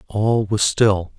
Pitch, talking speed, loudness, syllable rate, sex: 105 Hz, 150 wpm, -18 LUFS, 3.0 syllables/s, male